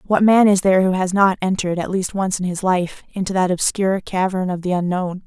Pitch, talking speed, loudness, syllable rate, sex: 185 Hz, 240 wpm, -18 LUFS, 5.8 syllables/s, female